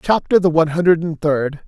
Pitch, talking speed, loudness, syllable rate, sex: 165 Hz, 215 wpm, -16 LUFS, 5.8 syllables/s, male